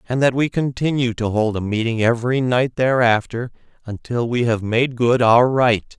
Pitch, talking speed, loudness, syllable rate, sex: 120 Hz, 180 wpm, -18 LUFS, 4.7 syllables/s, male